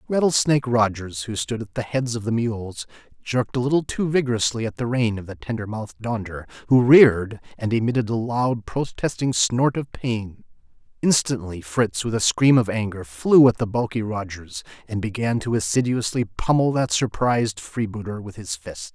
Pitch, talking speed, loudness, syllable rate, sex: 115 Hz, 175 wpm, -22 LUFS, 5.1 syllables/s, male